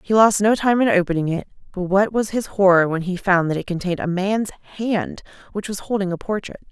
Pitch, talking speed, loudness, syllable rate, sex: 195 Hz, 230 wpm, -20 LUFS, 5.5 syllables/s, female